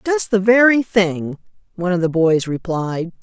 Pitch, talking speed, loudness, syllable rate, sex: 190 Hz, 165 wpm, -17 LUFS, 4.5 syllables/s, female